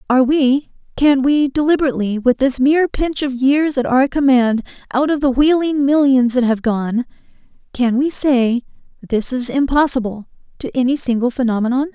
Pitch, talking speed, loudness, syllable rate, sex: 265 Hz, 150 wpm, -16 LUFS, 5.1 syllables/s, female